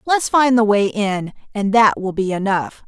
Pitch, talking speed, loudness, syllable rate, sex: 215 Hz, 210 wpm, -17 LUFS, 4.3 syllables/s, female